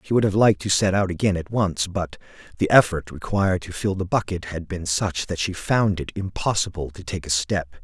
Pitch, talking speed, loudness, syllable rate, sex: 90 Hz, 230 wpm, -23 LUFS, 5.5 syllables/s, male